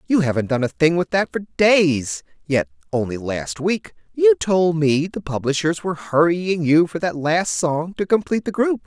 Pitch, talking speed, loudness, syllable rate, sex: 165 Hz, 195 wpm, -20 LUFS, 4.7 syllables/s, male